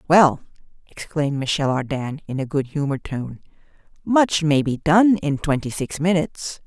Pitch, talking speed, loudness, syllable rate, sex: 150 Hz, 155 wpm, -21 LUFS, 4.9 syllables/s, female